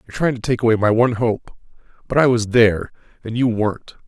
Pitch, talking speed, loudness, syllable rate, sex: 115 Hz, 220 wpm, -18 LUFS, 6.7 syllables/s, male